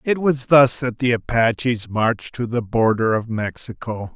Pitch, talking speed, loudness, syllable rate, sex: 120 Hz, 175 wpm, -19 LUFS, 4.4 syllables/s, male